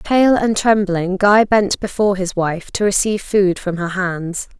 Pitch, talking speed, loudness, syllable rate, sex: 195 Hz, 185 wpm, -16 LUFS, 4.3 syllables/s, female